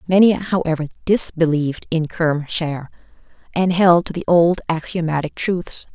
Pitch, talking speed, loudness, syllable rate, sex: 170 Hz, 130 wpm, -18 LUFS, 4.6 syllables/s, female